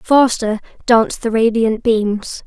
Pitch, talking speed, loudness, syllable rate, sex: 225 Hz, 120 wpm, -16 LUFS, 3.7 syllables/s, female